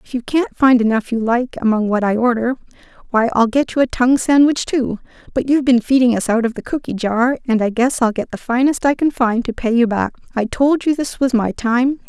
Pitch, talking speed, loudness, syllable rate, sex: 245 Hz, 250 wpm, -17 LUFS, 5.5 syllables/s, female